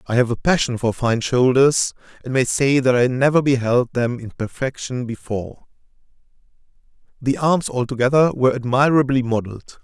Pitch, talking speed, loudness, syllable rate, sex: 130 Hz, 145 wpm, -19 LUFS, 5.2 syllables/s, male